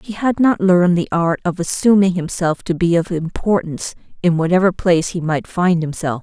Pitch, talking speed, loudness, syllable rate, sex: 175 Hz, 195 wpm, -17 LUFS, 5.4 syllables/s, female